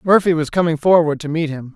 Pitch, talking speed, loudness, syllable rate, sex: 160 Hz, 240 wpm, -17 LUFS, 6.1 syllables/s, male